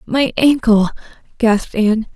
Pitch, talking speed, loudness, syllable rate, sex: 230 Hz, 110 wpm, -15 LUFS, 4.9 syllables/s, female